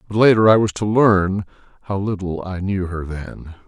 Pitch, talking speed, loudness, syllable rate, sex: 95 Hz, 195 wpm, -18 LUFS, 4.8 syllables/s, male